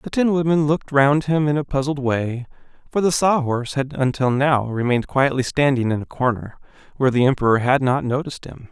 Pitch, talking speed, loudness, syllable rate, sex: 135 Hz, 205 wpm, -19 LUFS, 5.9 syllables/s, male